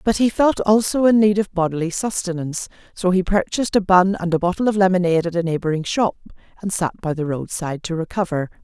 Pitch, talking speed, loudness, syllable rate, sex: 185 Hz, 210 wpm, -19 LUFS, 6.3 syllables/s, female